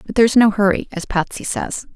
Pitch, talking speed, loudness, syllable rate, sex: 210 Hz, 215 wpm, -18 LUFS, 5.8 syllables/s, female